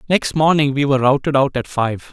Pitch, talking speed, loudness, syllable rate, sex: 140 Hz, 225 wpm, -16 LUFS, 5.7 syllables/s, male